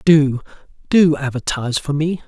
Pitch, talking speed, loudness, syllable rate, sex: 150 Hz, 130 wpm, -17 LUFS, 4.8 syllables/s, male